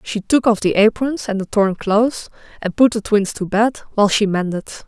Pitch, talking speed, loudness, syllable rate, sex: 210 Hz, 220 wpm, -17 LUFS, 5.3 syllables/s, female